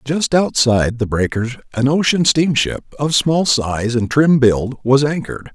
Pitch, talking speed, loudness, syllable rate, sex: 135 Hz, 160 wpm, -16 LUFS, 4.4 syllables/s, male